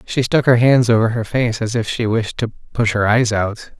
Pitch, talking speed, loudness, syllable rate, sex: 115 Hz, 255 wpm, -17 LUFS, 5.0 syllables/s, male